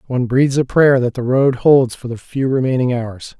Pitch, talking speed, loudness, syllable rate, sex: 125 Hz, 230 wpm, -15 LUFS, 5.3 syllables/s, male